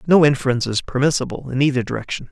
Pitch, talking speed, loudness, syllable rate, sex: 135 Hz, 180 wpm, -19 LUFS, 7.4 syllables/s, male